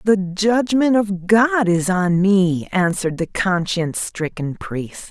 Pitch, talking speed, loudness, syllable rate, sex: 190 Hz, 140 wpm, -18 LUFS, 3.7 syllables/s, female